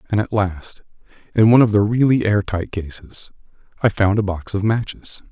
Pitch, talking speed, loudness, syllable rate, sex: 105 Hz, 190 wpm, -18 LUFS, 5.2 syllables/s, male